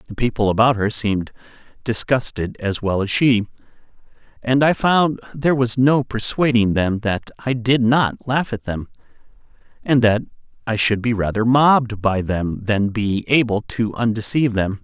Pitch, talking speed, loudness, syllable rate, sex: 115 Hz, 160 wpm, -19 LUFS, 4.7 syllables/s, male